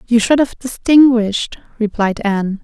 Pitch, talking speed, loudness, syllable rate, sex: 230 Hz, 135 wpm, -15 LUFS, 4.9 syllables/s, female